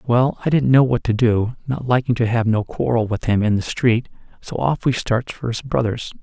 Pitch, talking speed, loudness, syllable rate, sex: 120 Hz, 240 wpm, -19 LUFS, 5.1 syllables/s, male